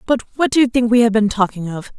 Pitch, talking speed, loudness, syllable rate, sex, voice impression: 225 Hz, 300 wpm, -16 LUFS, 6.2 syllables/s, female, feminine, slightly adult-like, tensed, clear